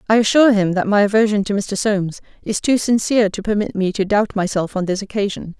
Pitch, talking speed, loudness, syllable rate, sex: 205 Hz, 225 wpm, -18 LUFS, 6.2 syllables/s, female